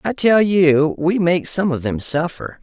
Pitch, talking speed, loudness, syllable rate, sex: 165 Hz, 205 wpm, -17 LUFS, 4.0 syllables/s, female